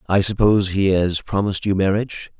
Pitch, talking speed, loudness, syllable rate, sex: 95 Hz, 175 wpm, -19 LUFS, 5.8 syllables/s, male